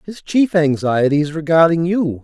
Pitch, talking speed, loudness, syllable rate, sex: 165 Hz, 160 wpm, -16 LUFS, 4.7 syllables/s, male